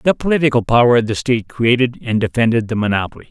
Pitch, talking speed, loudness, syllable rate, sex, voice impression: 120 Hz, 200 wpm, -16 LUFS, 7.0 syllables/s, male, masculine, very adult-like, cool, sincere, reassuring, slightly elegant